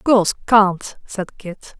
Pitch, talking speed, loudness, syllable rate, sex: 200 Hz, 135 wpm, -17 LUFS, 2.6 syllables/s, female